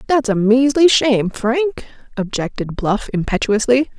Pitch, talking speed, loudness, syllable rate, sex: 235 Hz, 120 wpm, -16 LUFS, 4.4 syllables/s, female